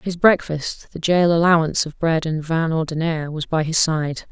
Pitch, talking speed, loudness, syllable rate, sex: 160 Hz, 165 wpm, -19 LUFS, 4.9 syllables/s, female